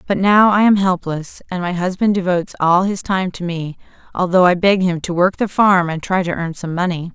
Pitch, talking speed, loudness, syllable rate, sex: 180 Hz, 235 wpm, -16 LUFS, 5.2 syllables/s, female